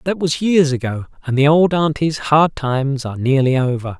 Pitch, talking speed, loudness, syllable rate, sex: 145 Hz, 195 wpm, -17 LUFS, 5.2 syllables/s, male